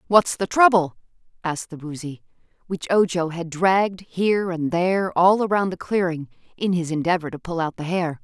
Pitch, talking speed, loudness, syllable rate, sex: 175 Hz, 180 wpm, -22 LUFS, 5.3 syllables/s, female